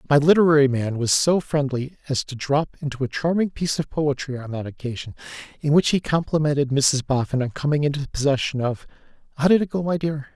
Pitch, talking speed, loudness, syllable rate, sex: 145 Hz, 195 wpm, -22 LUFS, 5.9 syllables/s, male